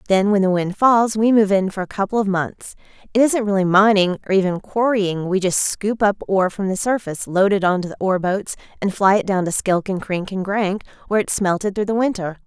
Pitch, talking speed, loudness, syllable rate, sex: 200 Hz, 235 wpm, -19 LUFS, 5.5 syllables/s, female